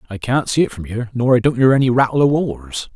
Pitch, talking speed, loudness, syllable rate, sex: 125 Hz, 285 wpm, -17 LUFS, 6.3 syllables/s, male